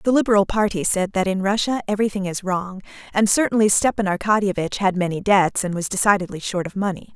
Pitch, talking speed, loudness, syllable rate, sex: 195 Hz, 195 wpm, -20 LUFS, 6.1 syllables/s, female